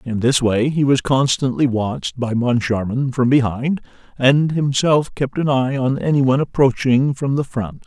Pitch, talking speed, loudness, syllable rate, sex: 130 Hz, 175 wpm, -18 LUFS, 4.6 syllables/s, male